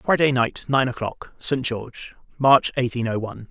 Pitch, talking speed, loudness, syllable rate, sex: 125 Hz, 170 wpm, -22 LUFS, 3.8 syllables/s, male